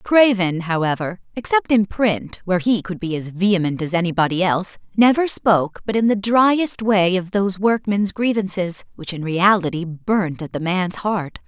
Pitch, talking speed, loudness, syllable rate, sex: 195 Hz, 175 wpm, -19 LUFS, 4.8 syllables/s, female